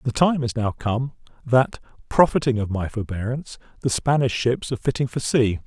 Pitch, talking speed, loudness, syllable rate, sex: 120 Hz, 170 wpm, -22 LUFS, 5.4 syllables/s, male